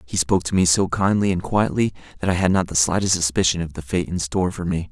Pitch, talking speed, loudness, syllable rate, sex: 90 Hz, 270 wpm, -20 LUFS, 6.4 syllables/s, male